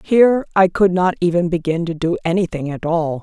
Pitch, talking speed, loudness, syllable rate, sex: 175 Hz, 205 wpm, -17 LUFS, 5.6 syllables/s, female